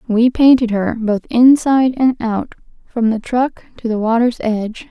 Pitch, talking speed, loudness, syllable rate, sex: 235 Hz, 170 wpm, -15 LUFS, 4.5 syllables/s, female